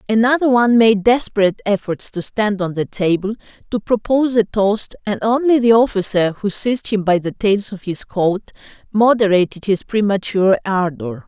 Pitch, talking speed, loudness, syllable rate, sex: 205 Hz, 165 wpm, -17 LUFS, 5.2 syllables/s, female